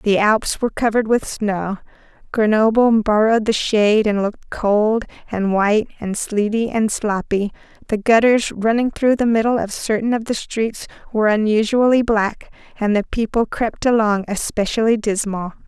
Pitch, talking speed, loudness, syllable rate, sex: 215 Hz, 155 wpm, -18 LUFS, 4.9 syllables/s, female